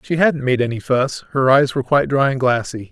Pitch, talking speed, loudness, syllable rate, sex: 135 Hz, 245 wpm, -17 LUFS, 5.9 syllables/s, male